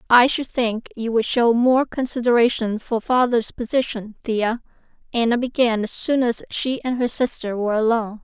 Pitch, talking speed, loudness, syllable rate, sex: 235 Hz, 170 wpm, -20 LUFS, 4.9 syllables/s, female